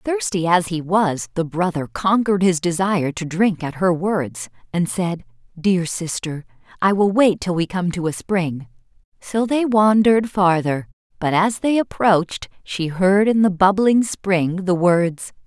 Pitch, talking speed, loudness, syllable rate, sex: 180 Hz, 165 wpm, -19 LUFS, 4.2 syllables/s, female